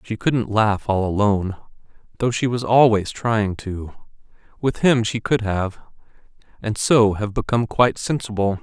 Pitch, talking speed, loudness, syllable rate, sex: 110 Hz, 155 wpm, -20 LUFS, 4.7 syllables/s, male